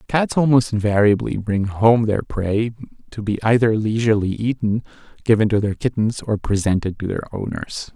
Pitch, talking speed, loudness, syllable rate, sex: 110 Hz, 160 wpm, -19 LUFS, 5.0 syllables/s, male